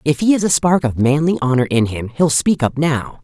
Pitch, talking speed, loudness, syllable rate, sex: 145 Hz, 260 wpm, -16 LUFS, 5.2 syllables/s, female